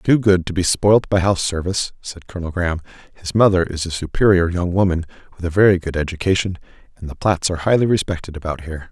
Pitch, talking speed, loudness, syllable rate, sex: 90 Hz, 210 wpm, -18 LUFS, 6.5 syllables/s, male